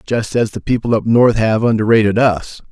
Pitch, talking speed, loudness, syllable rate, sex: 110 Hz, 200 wpm, -14 LUFS, 5.2 syllables/s, male